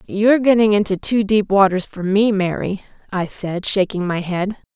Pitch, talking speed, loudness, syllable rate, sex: 200 Hz, 175 wpm, -18 LUFS, 4.7 syllables/s, female